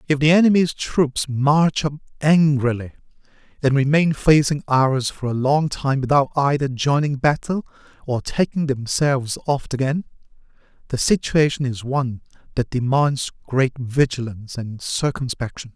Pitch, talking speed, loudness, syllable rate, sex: 140 Hz, 130 wpm, -20 LUFS, 4.6 syllables/s, male